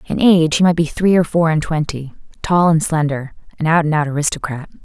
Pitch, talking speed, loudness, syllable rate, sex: 155 Hz, 225 wpm, -16 LUFS, 5.9 syllables/s, female